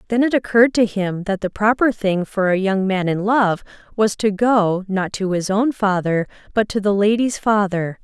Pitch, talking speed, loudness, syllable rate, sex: 205 Hz, 210 wpm, -18 LUFS, 4.7 syllables/s, female